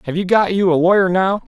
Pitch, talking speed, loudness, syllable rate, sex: 185 Hz, 270 wpm, -15 LUFS, 6.2 syllables/s, male